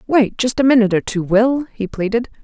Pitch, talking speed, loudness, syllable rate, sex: 230 Hz, 220 wpm, -16 LUFS, 5.7 syllables/s, female